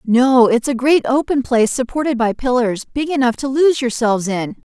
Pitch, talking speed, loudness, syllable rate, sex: 250 Hz, 190 wpm, -16 LUFS, 5.2 syllables/s, female